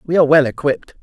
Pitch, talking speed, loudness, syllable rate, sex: 150 Hz, 235 wpm, -15 LUFS, 7.7 syllables/s, male